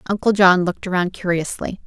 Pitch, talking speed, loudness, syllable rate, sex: 185 Hz, 160 wpm, -18 LUFS, 5.9 syllables/s, female